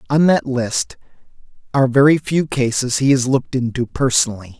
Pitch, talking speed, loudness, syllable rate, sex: 130 Hz, 155 wpm, -17 LUFS, 5.5 syllables/s, male